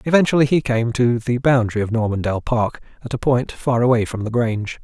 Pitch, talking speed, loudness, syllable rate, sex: 120 Hz, 210 wpm, -19 LUFS, 6.0 syllables/s, male